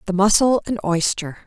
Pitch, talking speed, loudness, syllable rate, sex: 195 Hz, 165 wpm, -19 LUFS, 5.0 syllables/s, female